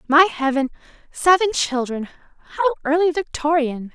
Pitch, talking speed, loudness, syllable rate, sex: 300 Hz, 90 wpm, -20 LUFS, 5.0 syllables/s, female